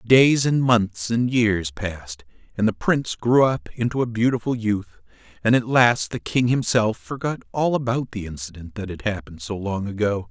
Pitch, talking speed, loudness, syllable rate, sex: 110 Hz, 185 wpm, -22 LUFS, 4.9 syllables/s, male